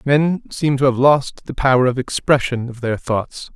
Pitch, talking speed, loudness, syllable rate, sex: 130 Hz, 205 wpm, -17 LUFS, 4.8 syllables/s, male